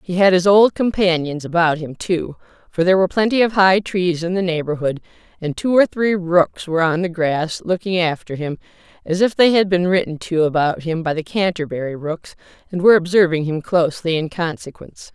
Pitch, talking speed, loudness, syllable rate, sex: 175 Hz, 200 wpm, -18 LUFS, 5.5 syllables/s, female